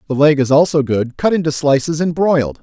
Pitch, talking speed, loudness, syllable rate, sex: 150 Hz, 230 wpm, -15 LUFS, 5.7 syllables/s, male